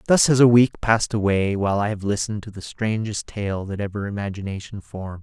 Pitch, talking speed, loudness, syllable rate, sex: 105 Hz, 205 wpm, -21 LUFS, 6.0 syllables/s, male